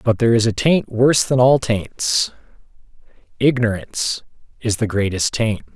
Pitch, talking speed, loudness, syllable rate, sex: 115 Hz, 135 wpm, -18 LUFS, 4.8 syllables/s, male